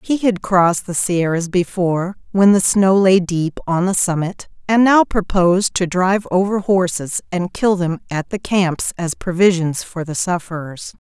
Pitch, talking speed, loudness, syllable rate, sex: 180 Hz, 175 wpm, -17 LUFS, 4.5 syllables/s, female